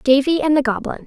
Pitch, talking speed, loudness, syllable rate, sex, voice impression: 280 Hz, 225 wpm, -17 LUFS, 5.8 syllables/s, female, very feminine, very young, thin, tensed, slightly powerful, very bright, very soft, very clear, fluent, very cute, intellectual, very refreshing, sincere, very calm, very friendly, very reassuring, very unique, elegant, slightly wild, very sweet, very lively, slightly kind, intense, sharp, very light